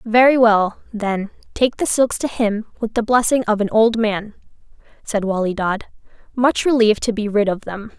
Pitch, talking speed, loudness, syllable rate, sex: 220 Hz, 190 wpm, -18 LUFS, 4.8 syllables/s, female